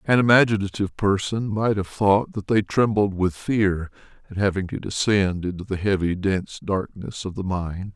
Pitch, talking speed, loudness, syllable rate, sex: 100 Hz, 175 wpm, -22 LUFS, 4.9 syllables/s, male